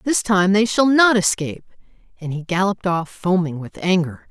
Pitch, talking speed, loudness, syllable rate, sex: 190 Hz, 180 wpm, -18 LUFS, 5.2 syllables/s, female